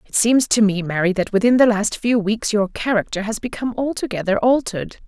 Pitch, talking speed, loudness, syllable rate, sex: 215 Hz, 200 wpm, -19 LUFS, 5.7 syllables/s, female